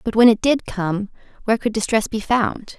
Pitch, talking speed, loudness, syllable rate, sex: 220 Hz, 215 wpm, -19 LUFS, 5.1 syllables/s, female